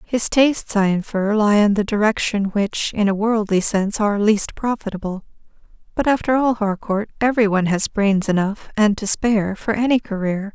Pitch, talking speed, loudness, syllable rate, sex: 210 Hz, 175 wpm, -19 LUFS, 5.2 syllables/s, female